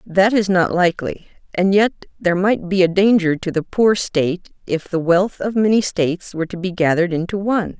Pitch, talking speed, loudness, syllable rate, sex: 185 Hz, 210 wpm, -18 LUFS, 5.5 syllables/s, female